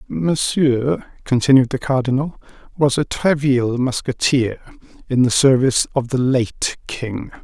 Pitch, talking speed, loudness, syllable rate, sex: 130 Hz, 120 wpm, -18 LUFS, 4.2 syllables/s, male